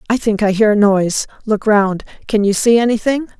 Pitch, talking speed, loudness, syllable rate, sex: 215 Hz, 210 wpm, -15 LUFS, 5.5 syllables/s, female